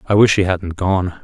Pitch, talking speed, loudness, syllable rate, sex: 95 Hz, 240 wpm, -16 LUFS, 4.9 syllables/s, male